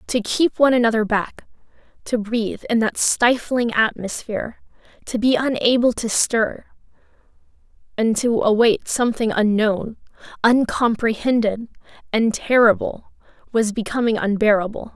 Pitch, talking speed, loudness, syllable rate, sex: 225 Hz, 110 wpm, -19 LUFS, 4.7 syllables/s, female